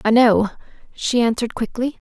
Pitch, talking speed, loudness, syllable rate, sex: 235 Hz, 140 wpm, -19 LUFS, 5.5 syllables/s, female